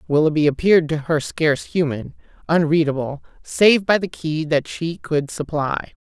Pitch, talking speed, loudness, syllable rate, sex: 155 Hz, 150 wpm, -19 LUFS, 4.7 syllables/s, female